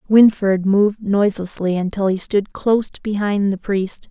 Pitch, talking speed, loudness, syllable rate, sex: 200 Hz, 145 wpm, -18 LUFS, 4.7 syllables/s, female